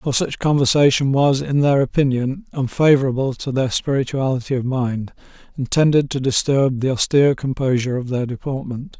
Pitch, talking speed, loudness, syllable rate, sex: 135 Hz, 155 wpm, -18 LUFS, 5.3 syllables/s, male